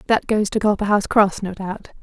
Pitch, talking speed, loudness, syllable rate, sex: 205 Hz, 210 wpm, -19 LUFS, 6.0 syllables/s, female